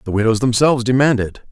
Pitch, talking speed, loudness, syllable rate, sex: 120 Hz, 200 wpm, -16 LUFS, 6.8 syllables/s, male